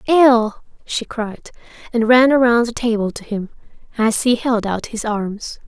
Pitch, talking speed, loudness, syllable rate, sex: 230 Hz, 170 wpm, -17 LUFS, 4.1 syllables/s, female